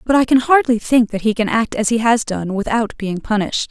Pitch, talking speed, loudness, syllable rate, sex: 225 Hz, 260 wpm, -16 LUFS, 5.5 syllables/s, female